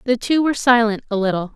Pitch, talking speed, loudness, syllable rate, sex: 230 Hz, 230 wpm, -18 LUFS, 6.8 syllables/s, female